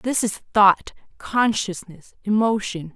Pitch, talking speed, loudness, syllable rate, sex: 205 Hz, 100 wpm, -20 LUFS, 3.5 syllables/s, female